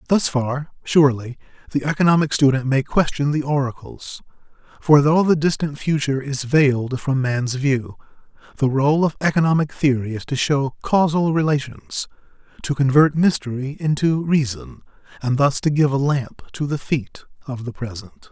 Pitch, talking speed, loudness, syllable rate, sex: 140 Hz, 155 wpm, -19 LUFS, 4.9 syllables/s, male